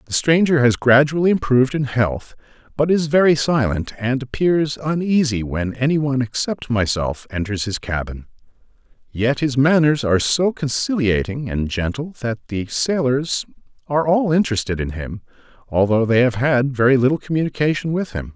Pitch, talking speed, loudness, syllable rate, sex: 130 Hz, 150 wpm, -19 LUFS, 5.0 syllables/s, male